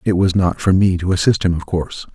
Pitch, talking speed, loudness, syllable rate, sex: 90 Hz, 280 wpm, -17 LUFS, 6.0 syllables/s, male